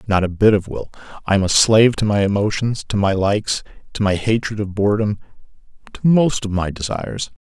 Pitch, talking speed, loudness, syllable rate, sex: 105 Hz, 185 wpm, -18 LUFS, 5.7 syllables/s, male